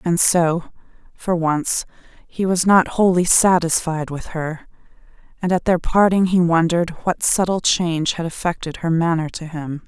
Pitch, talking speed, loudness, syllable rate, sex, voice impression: 170 Hz, 160 wpm, -18 LUFS, 4.5 syllables/s, female, very feminine, very adult-like, middle-aged, slightly thin, slightly relaxed, slightly weak, slightly bright, hard, clear, slightly fluent, cool, very intellectual, refreshing, very sincere, very calm, friendly, reassuring, slightly unique, very elegant, slightly wild, sweet, slightly strict, slightly sharp, slightly modest